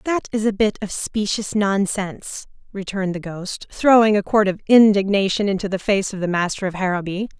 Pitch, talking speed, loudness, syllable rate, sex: 200 Hz, 185 wpm, -19 LUFS, 5.3 syllables/s, female